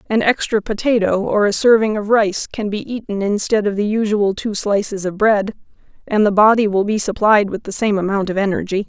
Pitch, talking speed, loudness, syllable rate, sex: 205 Hz, 210 wpm, -17 LUFS, 5.4 syllables/s, female